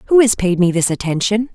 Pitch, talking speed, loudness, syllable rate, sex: 200 Hz, 235 wpm, -15 LUFS, 6.1 syllables/s, female